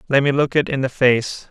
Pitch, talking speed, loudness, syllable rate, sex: 135 Hz, 280 wpm, -18 LUFS, 5.3 syllables/s, male